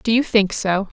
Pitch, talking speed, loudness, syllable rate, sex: 210 Hz, 240 wpm, -18 LUFS, 4.6 syllables/s, female